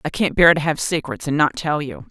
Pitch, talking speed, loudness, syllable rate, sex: 155 Hz, 285 wpm, -18 LUFS, 5.5 syllables/s, female